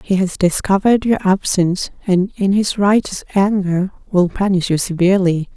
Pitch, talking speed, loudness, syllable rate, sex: 190 Hz, 150 wpm, -16 LUFS, 5.1 syllables/s, female